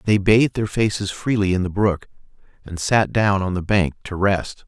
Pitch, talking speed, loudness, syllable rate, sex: 100 Hz, 205 wpm, -20 LUFS, 4.8 syllables/s, male